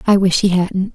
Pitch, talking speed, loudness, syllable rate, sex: 190 Hz, 255 wpm, -15 LUFS, 4.9 syllables/s, female